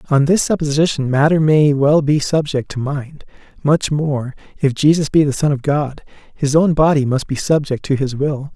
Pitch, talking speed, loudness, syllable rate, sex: 145 Hz, 195 wpm, -16 LUFS, 4.9 syllables/s, male